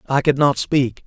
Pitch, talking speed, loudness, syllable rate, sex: 130 Hz, 225 wpm, -18 LUFS, 4.2 syllables/s, male